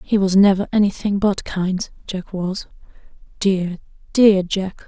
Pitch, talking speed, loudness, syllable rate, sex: 195 Hz, 110 wpm, -19 LUFS, 4.0 syllables/s, female